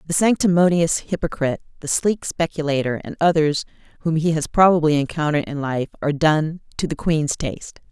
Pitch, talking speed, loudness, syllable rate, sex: 155 Hz, 160 wpm, -20 LUFS, 5.7 syllables/s, female